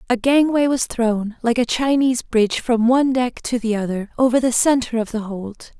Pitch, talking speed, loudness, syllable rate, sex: 240 Hz, 205 wpm, -19 LUFS, 5.2 syllables/s, female